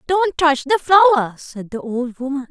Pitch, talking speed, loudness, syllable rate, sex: 290 Hz, 190 wpm, -17 LUFS, 4.8 syllables/s, female